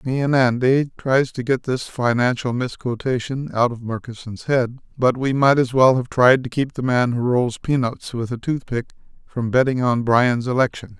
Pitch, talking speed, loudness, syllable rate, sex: 125 Hz, 190 wpm, -20 LUFS, 4.7 syllables/s, male